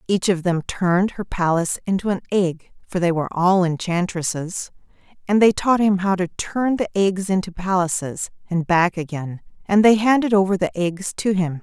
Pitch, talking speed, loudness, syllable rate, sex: 185 Hz, 175 wpm, -20 LUFS, 5.0 syllables/s, female